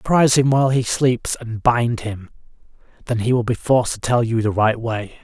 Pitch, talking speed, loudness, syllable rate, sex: 120 Hz, 220 wpm, -19 LUFS, 5.4 syllables/s, male